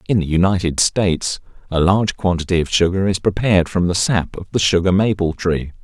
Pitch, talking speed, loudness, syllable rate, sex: 90 Hz, 195 wpm, -17 LUFS, 5.7 syllables/s, male